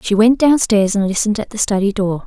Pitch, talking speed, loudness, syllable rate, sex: 210 Hz, 265 wpm, -15 LUFS, 6.0 syllables/s, female